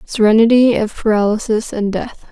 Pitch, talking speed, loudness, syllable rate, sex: 220 Hz, 130 wpm, -14 LUFS, 5.1 syllables/s, female